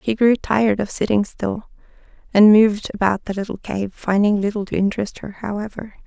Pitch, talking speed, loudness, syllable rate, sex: 205 Hz, 180 wpm, -19 LUFS, 5.6 syllables/s, female